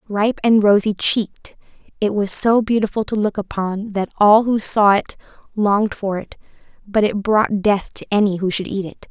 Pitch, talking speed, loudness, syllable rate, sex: 205 Hz, 190 wpm, -18 LUFS, 4.8 syllables/s, female